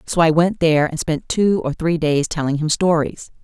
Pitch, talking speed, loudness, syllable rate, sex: 160 Hz, 225 wpm, -18 LUFS, 5.1 syllables/s, female